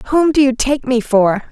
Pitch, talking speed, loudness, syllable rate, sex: 255 Hz, 235 wpm, -14 LUFS, 4.3 syllables/s, female